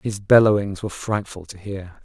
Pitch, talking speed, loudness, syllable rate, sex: 100 Hz, 175 wpm, -19 LUFS, 5.0 syllables/s, male